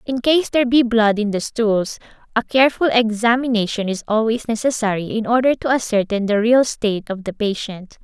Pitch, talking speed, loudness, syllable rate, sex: 225 Hz, 180 wpm, -18 LUFS, 5.4 syllables/s, female